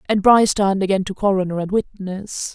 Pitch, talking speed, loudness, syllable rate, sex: 195 Hz, 190 wpm, -19 LUFS, 5.9 syllables/s, female